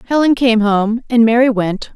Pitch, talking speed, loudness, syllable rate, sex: 230 Hz, 185 wpm, -13 LUFS, 4.9 syllables/s, female